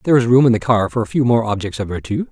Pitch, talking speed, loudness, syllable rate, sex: 115 Hz, 335 wpm, -16 LUFS, 7.3 syllables/s, male